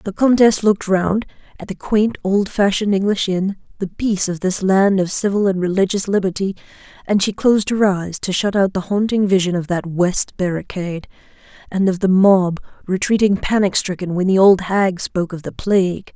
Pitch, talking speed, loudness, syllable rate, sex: 190 Hz, 185 wpm, -17 LUFS, 5.3 syllables/s, female